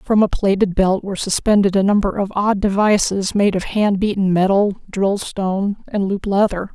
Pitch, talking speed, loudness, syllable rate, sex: 200 Hz, 185 wpm, -17 LUFS, 5.3 syllables/s, female